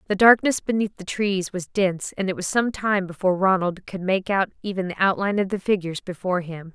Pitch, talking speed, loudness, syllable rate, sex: 190 Hz, 225 wpm, -23 LUFS, 6.0 syllables/s, female